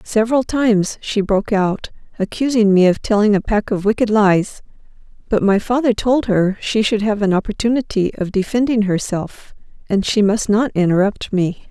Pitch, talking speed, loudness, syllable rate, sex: 210 Hz, 170 wpm, -17 LUFS, 5.0 syllables/s, female